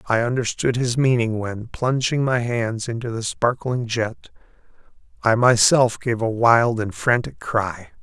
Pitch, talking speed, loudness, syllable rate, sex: 115 Hz, 150 wpm, -20 LUFS, 4.1 syllables/s, male